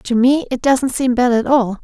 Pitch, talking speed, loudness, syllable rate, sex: 250 Hz, 260 wpm, -15 LUFS, 4.7 syllables/s, female